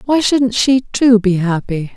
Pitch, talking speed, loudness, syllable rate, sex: 225 Hz, 185 wpm, -14 LUFS, 3.9 syllables/s, female